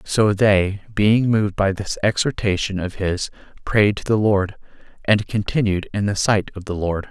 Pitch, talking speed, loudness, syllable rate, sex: 100 Hz, 175 wpm, -20 LUFS, 4.5 syllables/s, male